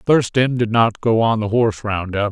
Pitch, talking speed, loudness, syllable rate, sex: 115 Hz, 205 wpm, -18 LUFS, 4.9 syllables/s, male